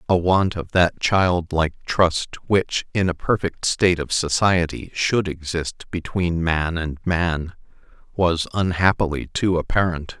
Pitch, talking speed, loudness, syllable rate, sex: 85 Hz, 135 wpm, -21 LUFS, 4.0 syllables/s, male